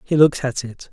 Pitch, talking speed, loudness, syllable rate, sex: 130 Hz, 260 wpm, -19 LUFS, 6.2 syllables/s, male